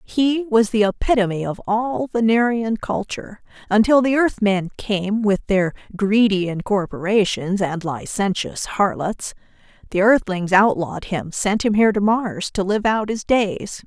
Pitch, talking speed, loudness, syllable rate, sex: 210 Hz, 145 wpm, -19 LUFS, 4.3 syllables/s, female